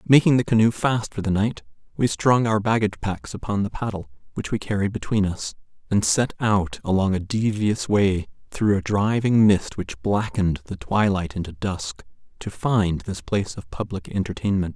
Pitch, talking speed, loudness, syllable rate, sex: 105 Hz, 180 wpm, -23 LUFS, 5.0 syllables/s, male